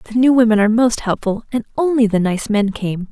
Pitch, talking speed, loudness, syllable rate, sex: 225 Hz, 230 wpm, -16 LUFS, 6.1 syllables/s, female